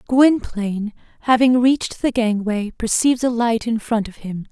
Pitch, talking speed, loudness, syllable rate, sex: 230 Hz, 160 wpm, -19 LUFS, 4.7 syllables/s, female